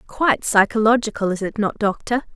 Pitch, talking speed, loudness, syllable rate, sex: 220 Hz, 155 wpm, -19 LUFS, 5.6 syllables/s, female